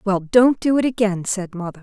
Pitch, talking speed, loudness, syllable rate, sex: 205 Hz, 230 wpm, -18 LUFS, 5.2 syllables/s, female